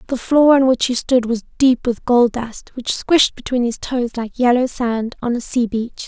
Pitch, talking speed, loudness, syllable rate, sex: 245 Hz, 225 wpm, -17 LUFS, 4.7 syllables/s, female